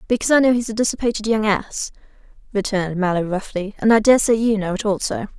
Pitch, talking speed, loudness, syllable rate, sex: 210 Hz, 200 wpm, -19 LUFS, 6.7 syllables/s, female